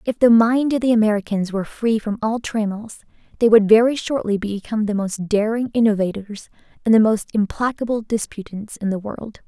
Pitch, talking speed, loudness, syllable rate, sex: 215 Hz, 175 wpm, -19 LUFS, 5.5 syllables/s, female